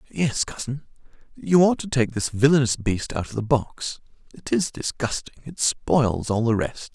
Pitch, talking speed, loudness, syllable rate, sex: 130 Hz, 165 wpm, -23 LUFS, 4.5 syllables/s, male